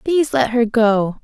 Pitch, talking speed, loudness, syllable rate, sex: 240 Hz, 195 wpm, -16 LUFS, 4.4 syllables/s, female